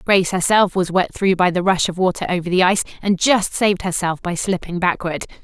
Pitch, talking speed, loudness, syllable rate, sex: 185 Hz, 220 wpm, -18 LUFS, 5.9 syllables/s, female